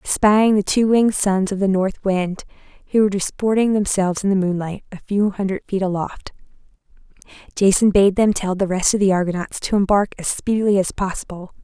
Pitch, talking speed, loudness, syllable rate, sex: 195 Hz, 185 wpm, -18 LUFS, 3.9 syllables/s, female